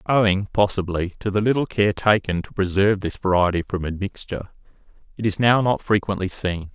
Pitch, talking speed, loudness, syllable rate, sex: 100 Hz, 170 wpm, -21 LUFS, 5.7 syllables/s, male